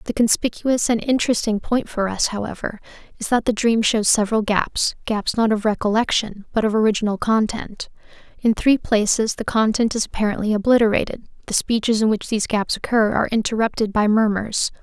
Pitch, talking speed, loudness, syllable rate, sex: 220 Hz, 170 wpm, -20 LUFS, 5.6 syllables/s, female